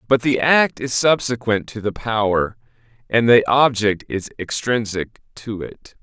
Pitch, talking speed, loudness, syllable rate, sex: 115 Hz, 150 wpm, -19 LUFS, 4.1 syllables/s, male